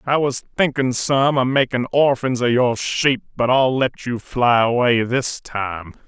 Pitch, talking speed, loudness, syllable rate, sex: 125 Hz, 180 wpm, -18 LUFS, 4.0 syllables/s, male